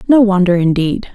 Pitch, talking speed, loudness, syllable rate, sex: 195 Hz, 155 wpm, -13 LUFS, 5.4 syllables/s, female